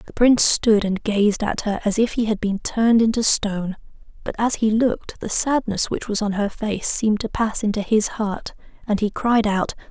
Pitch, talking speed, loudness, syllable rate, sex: 215 Hz, 220 wpm, -20 LUFS, 5.0 syllables/s, female